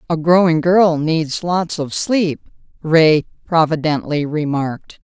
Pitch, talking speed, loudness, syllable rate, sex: 160 Hz, 120 wpm, -16 LUFS, 3.7 syllables/s, female